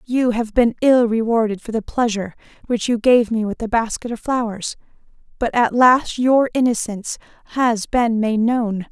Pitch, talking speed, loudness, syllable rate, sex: 230 Hz, 175 wpm, -18 LUFS, 4.8 syllables/s, female